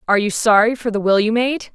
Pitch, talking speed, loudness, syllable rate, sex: 220 Hz, 275 wpm, -16 LUFS, 6.3 syllables/s, female